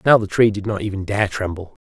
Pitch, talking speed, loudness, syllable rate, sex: 100 Hz, 265 wpm, -19 LUFS, 6.0 syllables/s, male